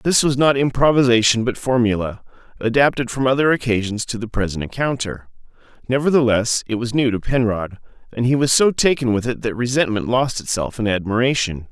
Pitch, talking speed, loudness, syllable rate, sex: 120 Hz, 170 wpm, -18 LUFS, 5.7 syllables/s, male